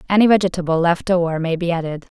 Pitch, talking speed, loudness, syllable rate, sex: 175 Hz, 190 wpm, -18 LUFS, 6.9 syllables/s, female